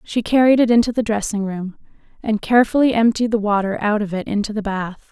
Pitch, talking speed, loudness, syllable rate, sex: 215 Hz, 210 wpm, -18 LUFS, 5.9 syllables/s, female